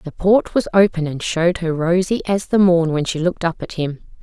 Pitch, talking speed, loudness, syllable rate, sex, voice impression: 175 Hz, 240 wpm, -18 LUFS, 5.5 syllables/s, female, feminine, gender-neutral, slightly young, slightly adult-like, slightly thin, slightly tensed, slightly powerful, slightly dark, slightly hard, clear, slightly fluent, cool, slightly intellectual, slightly refreshing, sincere, very calm, slightly friendly, slightly reassuring, unique, wild, slightly sweet, slightly lively, strict, sharp, slightly modest